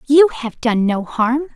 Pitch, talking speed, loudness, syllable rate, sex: 260 Hz, 190 wpm, -17 LUFS, 3.8 syllables/s, female